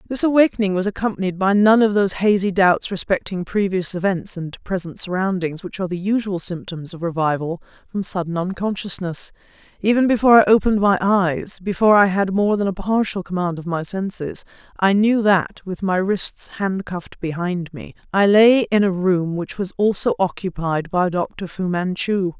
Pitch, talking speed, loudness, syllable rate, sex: 190 Hz, 175 wpm, -19 LUFS, 5.1 syllables/s, female